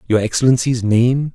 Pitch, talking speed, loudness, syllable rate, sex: 120 Hz, 135 wpm, -16 LUFS, 5.1 syllables/s, male